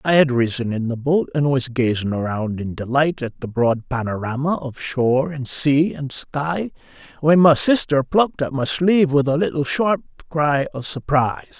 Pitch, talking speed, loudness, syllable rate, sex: 140 Hz, 185 wpm, -19 LUFS, 4.7 syllables/s, male